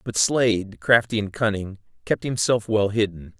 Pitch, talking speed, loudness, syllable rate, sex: 105 Hz, 160 wpm, -22 LUFS, 4.7 syllables/s, male